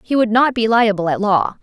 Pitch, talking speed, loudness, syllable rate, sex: 215 Hz, 260 wpm, -15 LUFS, 5.3 syllables/s, female